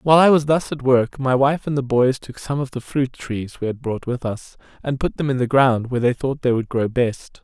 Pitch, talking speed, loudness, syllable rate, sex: 130 Hz, 280 wpm, -20 LUFS, 5.2 syllables/s, male